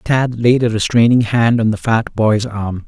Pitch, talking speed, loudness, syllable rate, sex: 115 Hz, 210 wpm, -15 LUFS, 4.2 syllables/s, male